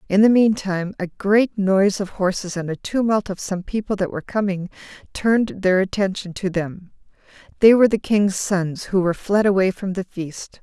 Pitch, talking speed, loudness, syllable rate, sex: 195 Hz, 200 wpm, -20 LUFS, 5.1 syllables/s, female